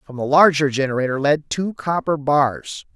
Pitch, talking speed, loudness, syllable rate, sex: 145 Hz, 160 wpm, -18 LUFS, 4.8 syllables/s, male